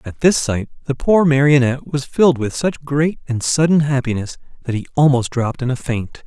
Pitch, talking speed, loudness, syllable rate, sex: 135 Hz, 200 wpm, -17 LUFS, 5.4 syllables/s, male